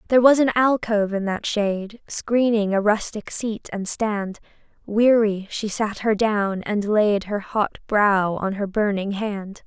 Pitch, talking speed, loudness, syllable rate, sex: 210 Hz, 170 wpm, -21 LUFS, 4.0 syllables/s, female